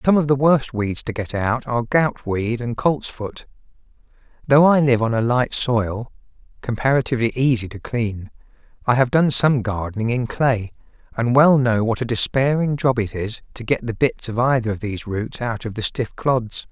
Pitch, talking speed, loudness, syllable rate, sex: 120 Hz, 190 wpm, -20 LUFS, 4.8 syllables/s, male